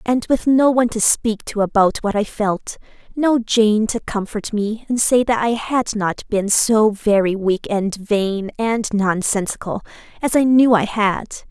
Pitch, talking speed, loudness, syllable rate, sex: 215 Hz, 185 wpm, -18 LUFS, 4.1 syllables/s, female